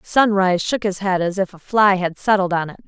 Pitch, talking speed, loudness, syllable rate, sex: 190 Hz, 250 wpm, -18 LUFS, 5.6 syllables/s, female